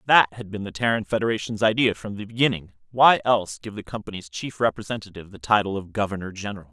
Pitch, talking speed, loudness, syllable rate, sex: 105 Hz, 195 wpm, -23 LUFS, 6.7 syllables/s, male